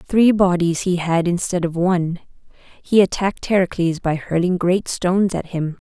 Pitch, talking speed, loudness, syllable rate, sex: 180 Hz, 165 wpm, -19 LUFS, 4.9 syllables/s, female